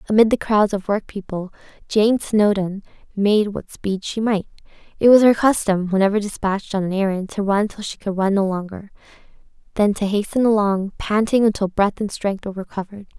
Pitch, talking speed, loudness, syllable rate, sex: 205 Hz, 180 wpm, -19 LUFS, 5.5 syllables/s, female